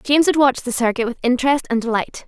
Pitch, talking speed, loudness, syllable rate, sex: 255 Hz, 235 wpm, -18 LUFS, 6.9 syllables/s, female